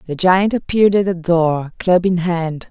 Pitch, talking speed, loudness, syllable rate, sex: 175 Hz, 200 wpm, -16 LUFS, 4.4 syllables/s, female